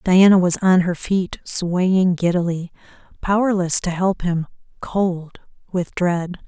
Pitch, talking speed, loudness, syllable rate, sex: 180 Hz, 130 wpm, -19 LUFS, 3.7 syllables/s, female